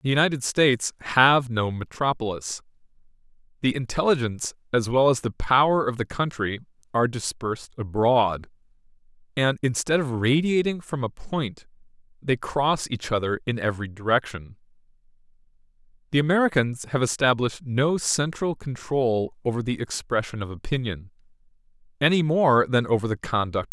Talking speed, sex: 135 wpm, male